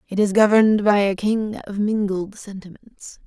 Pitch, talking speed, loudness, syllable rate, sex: 205 Hz, 165 wpm, -19 LUFS, 4.6 syllables/s, female